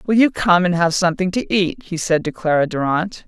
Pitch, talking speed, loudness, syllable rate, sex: 180 Hz, 240 wpm, -18 LUFS, 5.5 syllables/s, female